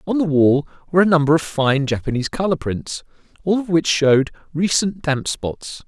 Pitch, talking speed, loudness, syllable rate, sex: 155 Hz, 185 wpm, -19 LUFS, 5.4 syllables/s, male